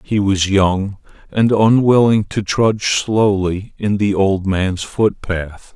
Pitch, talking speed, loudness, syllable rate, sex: 100 Hz, 135 wpm, -16 LUFS, 3.4 syllables/s, male